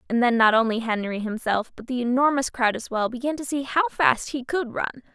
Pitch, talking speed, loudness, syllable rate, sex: 245 Hz, 235 wpm, -23 LUFS, 5.5 syllables/s, female